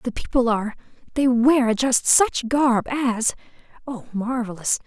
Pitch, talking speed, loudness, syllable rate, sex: 245 Hz, 110 wpm, -20 LUFS, 4.1 syllables/s, female